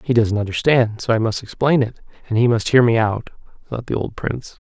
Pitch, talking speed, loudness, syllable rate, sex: 115 Hz, 230 wpm, -19 LUFS, 5.6 syllables/s, male